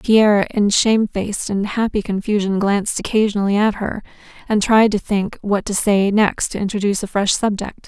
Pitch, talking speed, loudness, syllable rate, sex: 205 Hz, 175 wpm, -18 LUFS, 5.4 syllables/s, female